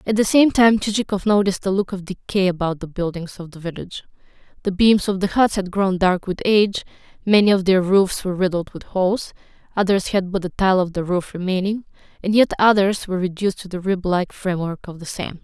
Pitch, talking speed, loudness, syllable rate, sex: 190 Hz, 220 wpm, -19 LUFS, 5.9 syllables/s, female